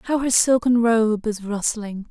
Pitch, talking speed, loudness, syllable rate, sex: 225 Hz, 170 wpm, -20 LUFS, 3.9 syllables/s, female